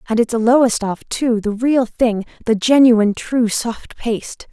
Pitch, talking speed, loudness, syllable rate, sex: 230 Hz, 160 wpm, -17 LUFS, 4.4 syllables/s, female